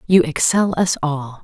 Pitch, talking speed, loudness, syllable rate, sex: 160 Hz, 165 wpm, -17 LUFS, 4.2 syllables/s, female